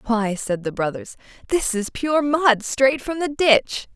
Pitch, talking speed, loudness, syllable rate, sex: 250 Hz, 180 wpm, -20 LUFS, 3.8 syllables/s, female